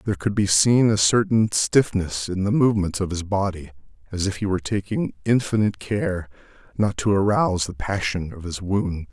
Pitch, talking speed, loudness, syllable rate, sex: 100 Hz, 185 wpm, -22 LUFS, 5.3 syllables/s, male